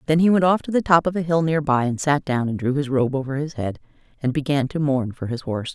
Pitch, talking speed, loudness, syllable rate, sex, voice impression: 145 Hz, 305 wpm, -21 LUFS, 6.2 syllables/s, female, feminine, middle-aged, tensed, powerful, slightly hard, clear, fluent, intellectual, elegant, lively, strict, sharp